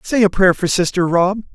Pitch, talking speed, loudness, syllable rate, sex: 190 Hz, 235 wpm, -15 LUFS, 5.2 syllables/s, male